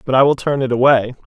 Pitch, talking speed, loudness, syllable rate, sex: 130 Hz, 275 wpm, -15 LUFS, 6.6 syllables/s, male